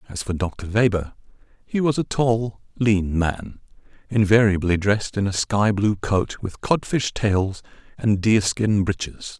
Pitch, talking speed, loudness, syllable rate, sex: 105 Hz, 145 wpm, -21 LUFS, 4.0 syllables/s, male